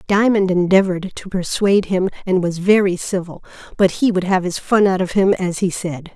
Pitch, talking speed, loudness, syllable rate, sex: 185 Hz, 205 wpm, -17 LUFS, 5.3 syllables/s, female